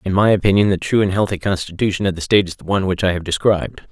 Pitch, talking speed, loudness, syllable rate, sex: 95 Hz, 275 wpm, -17 LUFS, 7.5 syllables/s, male